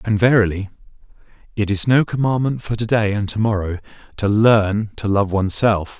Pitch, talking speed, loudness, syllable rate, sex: 105 Hz, 170 wpm, -18 LUFS, 5.2 syllables/s, male